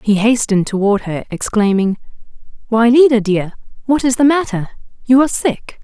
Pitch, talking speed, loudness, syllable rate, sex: 225 Hz, 155 wpm, -14 LUFS, 5.4 syllables/s, female